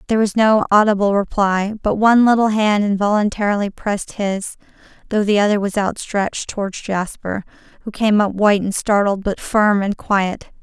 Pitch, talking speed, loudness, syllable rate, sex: 205 Hz, 165 wpm, -17 LUFS, 5.2 syllables/s, female